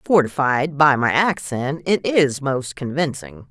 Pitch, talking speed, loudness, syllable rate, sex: 140 Hz, 135 wpm, -19 LUFS, 3.9 syllables/s, female